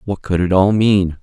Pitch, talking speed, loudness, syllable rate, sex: 95 Hz, 245 wpm, -15 LUFS, 4.6 syllables/s, male